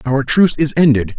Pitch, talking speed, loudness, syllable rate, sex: 140 Hz, 205 wpm, -13 LUFS, 5.8 syllables/s, male